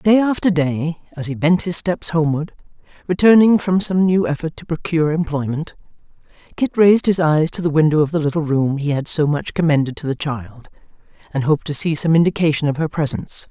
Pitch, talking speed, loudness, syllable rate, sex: 160 Hz, 200 wpm, -18 LUFS, 5.8 syllables/s, female